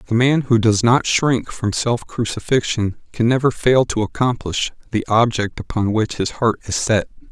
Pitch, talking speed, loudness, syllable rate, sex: 115 Hz, 180 wpm, -18 LUFS, 4.6 syllables/s, male